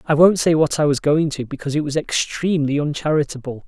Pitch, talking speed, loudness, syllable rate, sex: 150 Hz, 210 wpm, -19 LUFS, 6.2 syllables/s, male